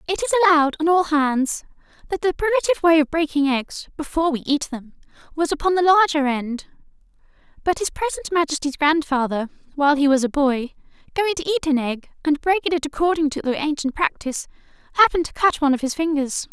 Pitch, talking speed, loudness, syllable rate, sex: 300 Hz, 190 wpm, -20 LUFS, 6.3 syllables/s, female